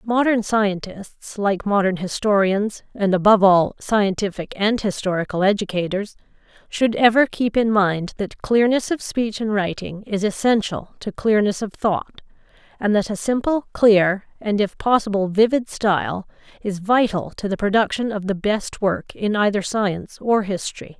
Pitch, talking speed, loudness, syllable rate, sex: 205 Hz, 150 wpm, -20 LUFS, 4.6 syllables/s, female